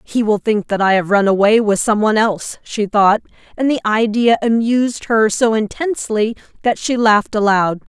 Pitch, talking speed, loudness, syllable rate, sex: 220 Hz, 190 wpm, -15 LUFS, 5.1 syllables/s, female